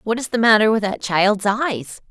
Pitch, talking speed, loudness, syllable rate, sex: 210 Hz, 230 wpm, -17 LUFS, 4.6 syllables/s, female